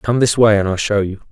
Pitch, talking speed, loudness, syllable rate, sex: 105 Hz, 320 wpm, -15 LUFS, 5.9 syllables/s, male